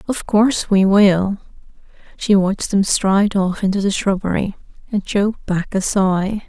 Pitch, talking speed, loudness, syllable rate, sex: 200 Hz, 155 wpm, -17 LUFS, 4.6 syllables/s, female